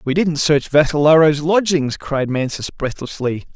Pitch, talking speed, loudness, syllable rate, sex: 150 Hz, 135 wpm, -17 LUFS, 4.4 syllables/s, male